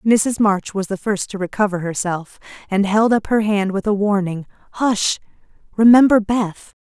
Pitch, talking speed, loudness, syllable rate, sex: 205 Hz, 165 wpm, -18 LUFS, 4.5 syllables/s, female